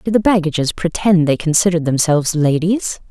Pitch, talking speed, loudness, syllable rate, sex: 170 Hz, 155 wpm, -15 LUFS, 5.7 syllables/s, female